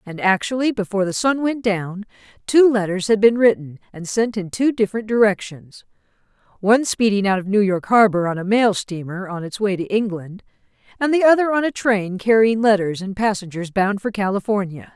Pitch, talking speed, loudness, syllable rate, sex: 205 Hz, 185 wpm, -19 LUFS, 5.4 syllables/s, female